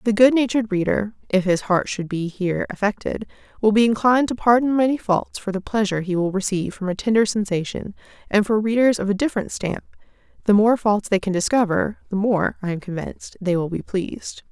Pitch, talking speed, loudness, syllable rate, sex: 205 Hz, 205 wpm, -21 LUFS, 5.9 syllables/s, female